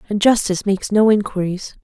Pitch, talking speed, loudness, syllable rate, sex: 200 Hz, 165 wpm, -17 LUFS, 6.1 syllables/s, female